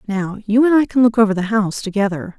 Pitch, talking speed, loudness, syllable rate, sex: 215 Hz, 250 wpm, -16 LUFS, 6.5 syllables/s, female